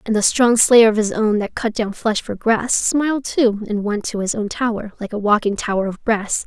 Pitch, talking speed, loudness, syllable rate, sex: 220 Hz, 250 wpm, -18 LUFS, 5.0 syllables/s, female